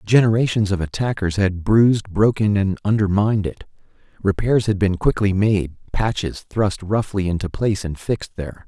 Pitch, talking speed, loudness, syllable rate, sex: 100 Hz, 150 wpm, -20 LUFS, 5.2 syllables/s, male